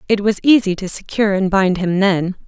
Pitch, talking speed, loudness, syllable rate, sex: 195 Hz, 220 wpm, -16 LUFS, 5.4 syllables/s, female